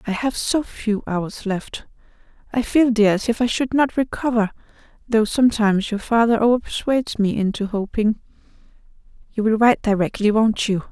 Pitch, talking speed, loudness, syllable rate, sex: 220 Hz, 160 wpm, -20 LUFS, 5.2 syllables/s, female